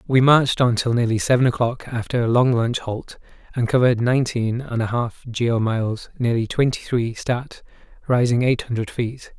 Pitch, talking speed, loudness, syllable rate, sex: 120 Hz, 180 wpm, -20 LUFS, 5.4 syllables/s, male